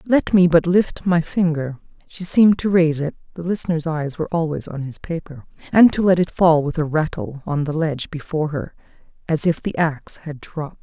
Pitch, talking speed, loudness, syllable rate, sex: 165 Hz, 210 wpm, -20 LUFS, 4.5 syllables/s, female